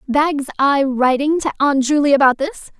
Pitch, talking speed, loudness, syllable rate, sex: 285 Hz, 170 wpm, -16 LUFS, 4.6 syllables/s, female